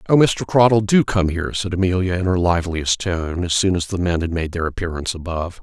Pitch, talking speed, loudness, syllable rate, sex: 90 Hz, 225 wpm, -19 LUFS, 5.9 syllables/s, male